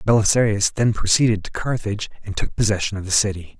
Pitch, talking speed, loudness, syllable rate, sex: 105 Hz, 185 wpm, -20 LUFS, 6.3 syllables/s, male